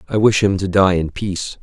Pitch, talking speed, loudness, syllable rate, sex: 95 Hz, 260 wpm, -17 LUFS, 5.6 syllables/s, male